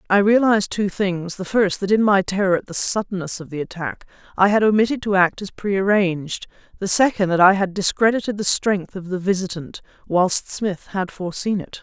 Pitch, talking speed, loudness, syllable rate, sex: 195 Hz, 205 wpm, -20 LUFS, 5.4 syllables/s, female